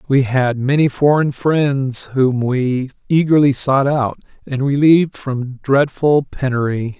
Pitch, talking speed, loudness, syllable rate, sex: 135 Hz, 130 wpm, -16 LUFS, 3.7 syllables/s, male